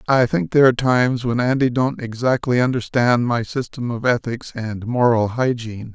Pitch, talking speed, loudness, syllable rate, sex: 120 Hz, 170 wpm, -19 LUFS, 5.2 syllables/s, male